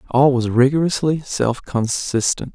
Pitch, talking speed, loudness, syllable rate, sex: 130 Hz, 120 wpm, -18 LUFS, 4.3 syllables/s, male